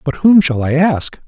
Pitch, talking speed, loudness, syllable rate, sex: 155 Hz, 235 wpm, -13 LUFS, 4.4 syllables/s, male